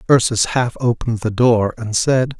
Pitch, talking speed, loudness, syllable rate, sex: 115 Hz, 175 wpm, -17 LUFS, 4.8 syllables/s, male